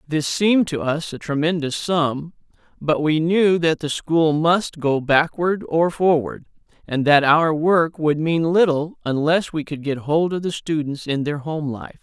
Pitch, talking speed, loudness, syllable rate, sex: 155 Hz, 185 wpm, -20 LUFS, 4.1 syllables/s, male